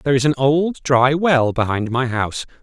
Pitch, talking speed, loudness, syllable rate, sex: 135 Hz, 205 wpm, -17 LUFS, 5.0 syllables/s, male